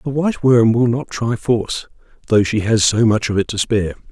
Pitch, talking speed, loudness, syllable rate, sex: 115 Hz, 235 wpm, -17 LUFS, 5.5 syllables/s, male